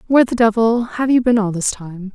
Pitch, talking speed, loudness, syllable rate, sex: 220 Hz, 250 wpm, -16 LUFS, 5.6 syllables/s, female